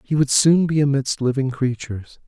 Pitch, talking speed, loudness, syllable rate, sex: 135 Hz, 185 wpm, -19 LUFS, 5.3 syllables/s, male